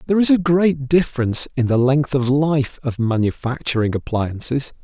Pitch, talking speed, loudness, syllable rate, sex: 135 Hz, 160 wpm, -18 LUFS, 5.2 syllables/s, male